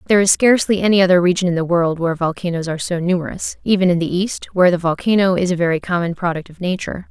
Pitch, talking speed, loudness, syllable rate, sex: 180 Hz, 235 wpm, -17 LUFS, 7.2 syllables/s, female